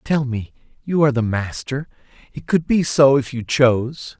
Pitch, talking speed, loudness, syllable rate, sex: 135 Hz, 185 wpm, -19 LUFS, 4.8 syllables/s, male